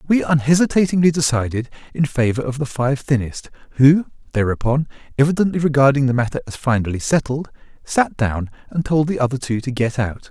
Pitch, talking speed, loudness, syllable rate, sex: 135 Hz, 165 wpm, -19 LUFS, 5.8 syllables/s, male